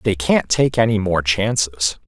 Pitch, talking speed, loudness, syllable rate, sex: 105 Hz, 175 wpm, -18 LUFS, 4.2 syllables/s, male